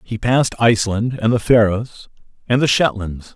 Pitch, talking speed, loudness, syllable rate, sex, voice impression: 110 Hz, 160 wpm, -17 LUFS, 5.0 syllables/s, male, very masculine, very adult-like, slightly thick, cool, sincere, slightly calm, slightly wild